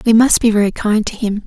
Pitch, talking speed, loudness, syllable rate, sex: 215 Hz, 285 wpm, -14 LUFS, 5.9 syllables/s, female